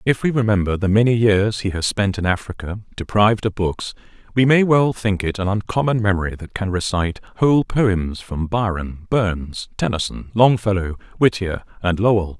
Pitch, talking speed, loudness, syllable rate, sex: 100 Hz, 170 wpm, -19 LUFS, 5.1 syllables/s, male